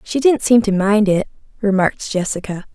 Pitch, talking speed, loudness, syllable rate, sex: 210 Hz, 175 wpm, -17 LUFS, 5.3 syllables/s, female